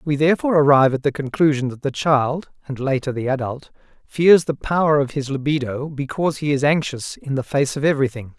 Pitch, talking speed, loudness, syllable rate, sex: 140 Hz, 200 wpm, -19 LUFS, 5.6 syllables/s, male